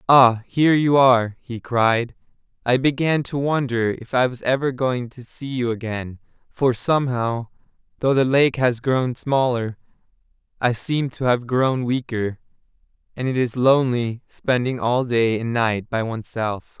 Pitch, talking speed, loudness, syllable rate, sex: 125 Hz, 155 wpm, -21 LUFS, 4.3 syllables/s, male